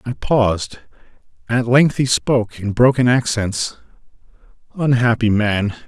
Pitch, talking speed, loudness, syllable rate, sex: 115 Hz, 110 wpm, -17 LUFS, 4.3 syllables/s, male